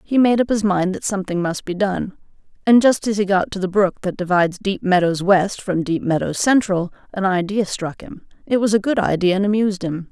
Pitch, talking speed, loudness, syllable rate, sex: 195 Hz, 230 wpm, -19 LUFS, 5.5 syllables/s, female